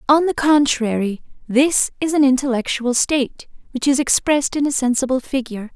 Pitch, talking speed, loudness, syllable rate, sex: 265 Hz, 155 wpm, -18 LUFS, 5.4 syllables/s, female